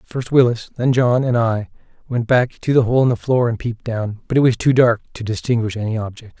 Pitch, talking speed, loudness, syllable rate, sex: 120 Hz, 245 wpm, -18 LUFS, 5.7 syllables/s, male